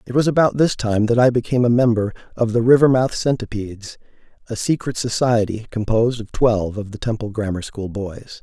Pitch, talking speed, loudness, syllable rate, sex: 115 Hz, 185 wpm, -19 LUFS, 5.7 syllables/s, male